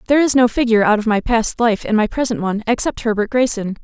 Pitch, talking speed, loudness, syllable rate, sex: 230 Hz, 250 wpm, -17 LUFS, 6.7 syllables/s, female